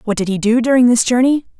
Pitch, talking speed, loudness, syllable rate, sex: 235 Hz, 265 wpm, -14 LUFS, 6.6 syllables/s, female